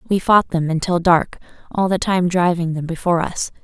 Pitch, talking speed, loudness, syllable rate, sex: 175 Hz, 200 wpm, -18 LUFS, 5.3 syllables/s, female